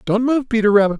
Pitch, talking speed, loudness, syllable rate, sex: 225 Hz, 240 wpm, -16 LUFS, 6.4 syllables/s, male